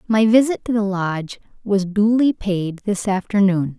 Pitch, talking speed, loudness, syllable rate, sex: 205 Hz, 160 wpm, -19 LUFS, 4.4 syllables/s, female